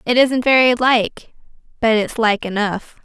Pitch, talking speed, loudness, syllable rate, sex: 230 Hz, 160 wpm, -16 LUFS, 4.2 syllables/s, female